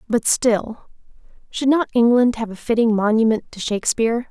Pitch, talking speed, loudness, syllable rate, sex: 230 Hz, 155 wpm, -18 LUFS, 5.3 syllables/s, female